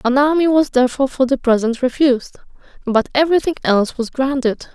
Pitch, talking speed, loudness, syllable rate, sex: 265 Hz, 175 wpm, -16 LUFS, 6.4 syllables/s, female